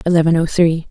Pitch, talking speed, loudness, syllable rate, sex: 165 Hz, 200 wpm, -15 LUFS, 6.7 syllables/s, female